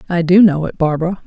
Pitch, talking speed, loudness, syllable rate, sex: 170 Hz, 240 wpm, -14 LUFS, 6.5 syllables/s, female